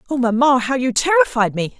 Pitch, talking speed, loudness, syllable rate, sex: 255 Hz, 200 wpm, -17 LUFS, 5.7 syllables/s, female